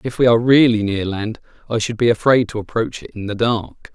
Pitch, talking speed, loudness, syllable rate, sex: 115 Hz, 245 wpm, -18 LUFS, 5.6 syllables/s, male